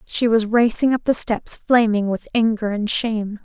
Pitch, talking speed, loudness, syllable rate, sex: 220 Hz, 190 wpm, -19 LUFS, 4.6 syllables/s, female